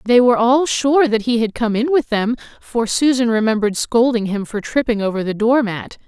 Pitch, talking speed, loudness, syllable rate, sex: 235 Hz, 215 wpm, -17 LUFS, 5.3 syllables/s, female